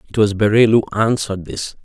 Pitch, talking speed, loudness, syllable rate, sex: 105 Hz, 195 wpm, -16 LUFS, 5.9 syllables/s, male